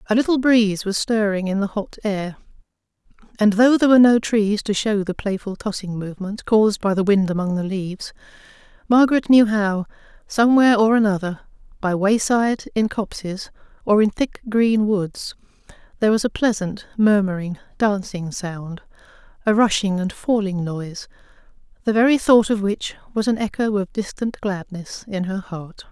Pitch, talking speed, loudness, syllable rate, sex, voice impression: 205 Hz, 160 wpm, -20 LUFS, 5.1 syllables/s, female, very feminine, slightly gender-neutral, slightly young, slightly adult-like, very thin, very relaxed, weak, slightly dark, hard, clear, fluent, cute, very intellectual, refreshing, very sincere, very calm, mature, very friendly, very reassuring, very unique, elegant, sweet, slightly lively